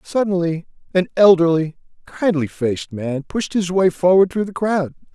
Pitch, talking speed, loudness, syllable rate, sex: 175 Hz, 150 wpm, -18 LUFS, 4.7 syllables/s, male